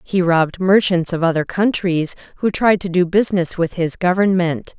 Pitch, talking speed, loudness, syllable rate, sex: 180 Hz, 175 wpm, -17 LUFS, 5.0 syllables/s, female